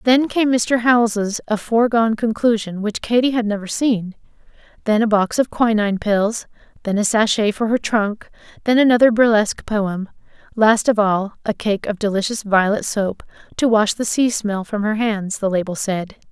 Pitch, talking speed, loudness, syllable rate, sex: 215 Hz, 175 wpm, -18 LUFS, 4.9 syllables/s, female